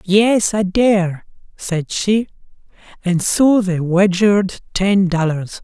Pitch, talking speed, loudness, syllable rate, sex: 190 Hz, 115 wpm, -16 LUFS, 3.2 syllables/s, male